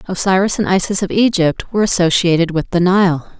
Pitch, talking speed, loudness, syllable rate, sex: 180 Hz, 175 wpm, -15 LUFS, 5.7 syllables/s, female